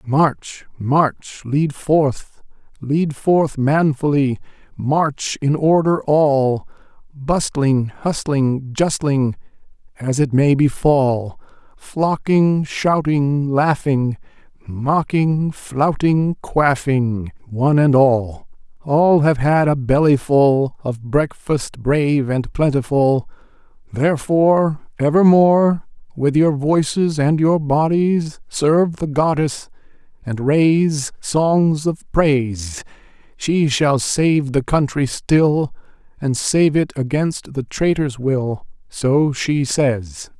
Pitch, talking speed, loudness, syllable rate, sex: 145 Hz, 105 wpm, -17 LUFS, 3.1 syllables/s, male